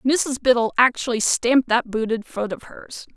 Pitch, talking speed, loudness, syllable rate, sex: 240 Hz, 170 wpm, -20 LUFS, 4.7 syllables/s, female